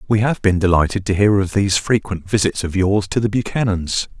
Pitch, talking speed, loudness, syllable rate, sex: 100 Hz, 215 wpm, -18 LUFS, 5.6 syllables/s, male